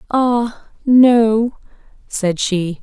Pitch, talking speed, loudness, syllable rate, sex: 220 Hz, 85 wpm, -15 LUFS, 2.1 syllables/s, female